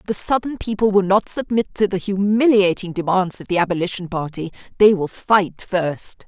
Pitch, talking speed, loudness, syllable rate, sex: 190 Hz, 170 wpm, -19 LUFS, 4.9 syllables/s, female